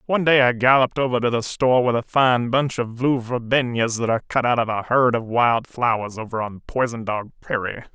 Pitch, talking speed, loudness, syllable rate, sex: 120 Hz, 225 wpm, -20 LUFS, 5.6 syllables/s, male